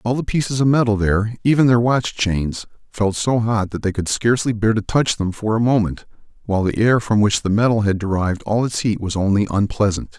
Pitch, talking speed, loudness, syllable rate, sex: 110 Hz, 230 wpm, -18 LUFS, 5.7 syllables/s, male